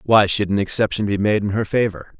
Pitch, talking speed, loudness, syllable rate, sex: 100 Hz, 245 wpm, -19 LUFS, 5.7 syllables/s, male